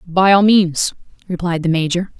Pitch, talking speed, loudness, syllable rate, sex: 180 Hz, 165 wpm, -15 LUFS, 4.7 syllables/s, female